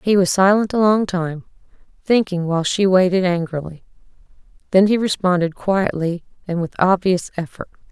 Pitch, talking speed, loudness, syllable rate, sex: 185 Hz, 145 wpm, -18 LUFS, 5.1 syllables/s, female